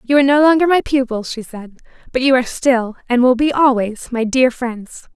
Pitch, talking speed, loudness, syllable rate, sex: 250 Hz, 220 wpm, -15 LUFS, 5.2 syllables/s, female